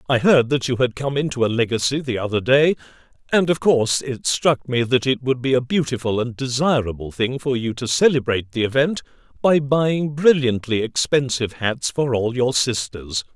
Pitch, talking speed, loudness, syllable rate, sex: 130 Hz, 190 wpm, -20 LUFS, 5.1 syllables/s, male